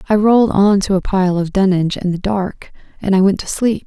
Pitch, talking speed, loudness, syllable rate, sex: 195 Hz, 250 wpm, -15 LUFS, 5.7 syllables/s, female